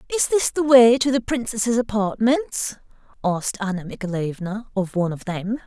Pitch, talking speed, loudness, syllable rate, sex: 225 Hz, 160 wpm, -21 LUFS, 5.2 syllables/s, female